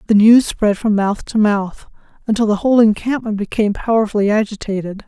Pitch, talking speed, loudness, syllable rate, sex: 215 Hz, 165 wpm, -16 LUFS, 5.8 syllables/s, female